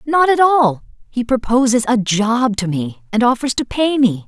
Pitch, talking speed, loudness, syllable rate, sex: 240 Hz, 195 wpm, -16 LUFS, 4.5 syllables/s, female